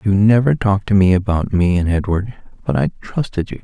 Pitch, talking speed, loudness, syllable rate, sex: 95 Hz, 215 wpm, -16 LUFS, 5.6 syllables/s, male